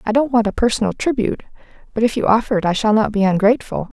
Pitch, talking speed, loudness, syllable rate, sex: 220 Hz, 240 wpm, -17 LUFS, 7.3 syllables/s, female